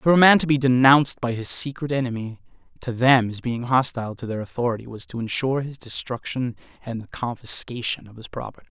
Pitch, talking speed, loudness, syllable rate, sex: 125 Hz, 200 wpm, -22 LUFS, 6.0 syllables/s, male